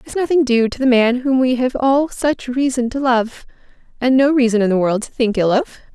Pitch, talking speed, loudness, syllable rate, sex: 250 Hz, 240 wpm, -16 LUFS, 5.3 syllables/s, female